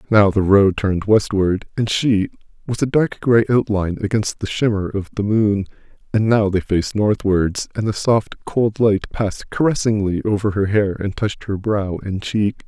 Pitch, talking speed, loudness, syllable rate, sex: 105 Hz, 185 wpm, -19 LUFS, 4.8 syllables/s, male